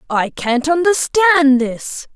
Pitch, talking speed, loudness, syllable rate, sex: 290 Hz, 110 wpm, -14 LUFS, 3.2 syllables/s, female